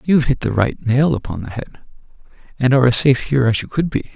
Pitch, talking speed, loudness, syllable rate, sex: 125 Hz, 245 wpm, -17 LUFS, 6.7 syllables/s, male